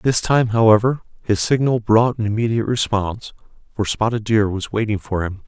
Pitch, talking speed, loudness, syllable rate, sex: 110 Hz, 175 wpm, -18 LUFS, 5.4 syllables/s, male